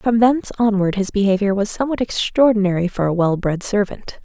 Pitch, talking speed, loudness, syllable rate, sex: 205 Hz, 185 wpm, -18 LUFS, 5.7 syllables/s, female